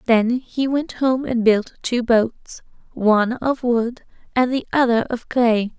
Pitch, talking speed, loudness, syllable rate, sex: 240 Hz, 165 wpm, -19 LUFS, 3.7 syllables/s, female